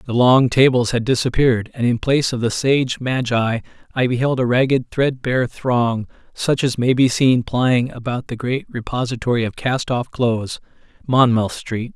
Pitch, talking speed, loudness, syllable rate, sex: 125 Hz, 170 wpm, -18 LUFS, 4.8 syllables/s, male